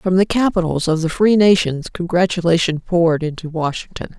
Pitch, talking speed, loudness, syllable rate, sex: 175 Hz, 160 wpm, -17 LUFS, 5.4 syllables/s, female